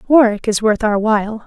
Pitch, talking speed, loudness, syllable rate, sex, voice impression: 220 Hz, 205 wpm, -15 LUFS, 5.3 syllables/s, female, very feminine, slightly young, very thin, tensed, slightly weak, slightly bright, slightly soft, very clear, fluent, very cute, intellectual, very refreshing, sincere, calm, very friendly, very reassuring, very unique, very elegant, very sweet, lively, very kind, slightly sharp, slightly modest, light